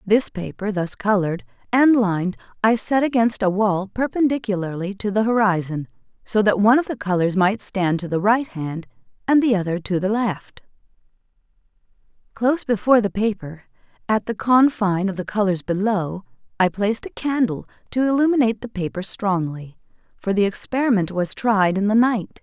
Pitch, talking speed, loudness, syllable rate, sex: 205 Hz, 165 wpm, -20 LUFS, 5.3 syllables/s, female